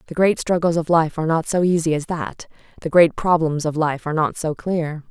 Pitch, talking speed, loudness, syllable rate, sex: 160 Hz, 235 wpm, -19 LUFS, 5.5 syllables/s, female